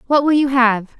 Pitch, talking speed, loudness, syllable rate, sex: 260 Hz, 240 wpm, -15 LUFS, 5.0 syllables/s, female